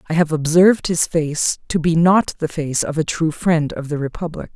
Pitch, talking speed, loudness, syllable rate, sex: 160 Hz, 225 wpm, -18 LUFS, 4.9 syllables/s, female